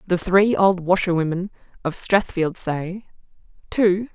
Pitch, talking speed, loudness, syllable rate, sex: 185 Hz, 115 wpm, -20 LUFS, 3.9 syllables/s, female